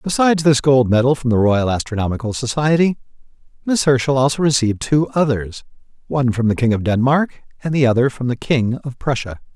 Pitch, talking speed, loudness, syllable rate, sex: 130 Hz, 180 wpm, -17 LUFS, 5.9 syllables/s, male